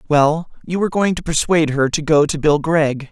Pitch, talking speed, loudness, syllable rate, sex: 155 Hz, 230 wpm, -17 LUFS, 5.4 syllables/s, male